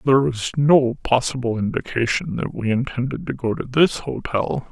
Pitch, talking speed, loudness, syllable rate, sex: 125 Hz, 165 wpm, -21 LUFS, 4.9 syllables/s, male